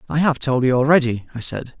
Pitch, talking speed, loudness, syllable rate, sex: 135 Hz, 235 wpm, -19 LUFS, 6.0 syllables/s, male